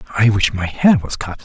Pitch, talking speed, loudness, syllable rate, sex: 110 Hz, 250 wpm, -16 LUFS, 5.9 syllables/s, male